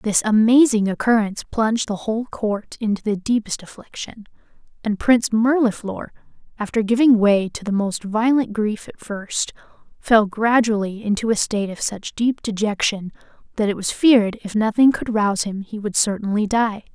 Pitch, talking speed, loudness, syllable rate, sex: 215 Hz, 165 wpm, -20 LUFS, 5.0 syllables/s, female